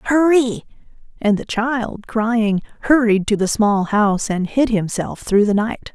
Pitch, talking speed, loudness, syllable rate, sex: 220 Hz, 160 wpm, -18 LUFS, 4.4 syllables/s, female